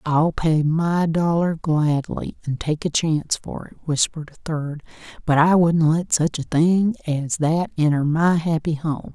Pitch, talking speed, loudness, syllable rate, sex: 160 Hz, 175 wpm, -21 LUFS, 4.2 syllables/s, female